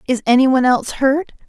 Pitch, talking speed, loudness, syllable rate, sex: 260 Hz, 205 wpm, -15 LUFS, 6.9 syllables/s, female